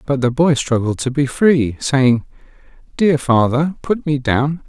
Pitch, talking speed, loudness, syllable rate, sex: 140 Hz, 165 wpm, -16 LUFS, 4.0 syllables/s, male